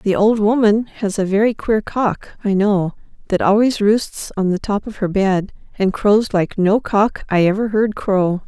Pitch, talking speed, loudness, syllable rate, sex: 205 Hz, 200 wpm, -17 LUFS, 4.2 syllables/s, female